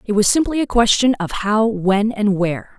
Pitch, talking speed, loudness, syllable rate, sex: 215 Hz, 215 wpm, -17 LUFS, 4.9 syllables/s, female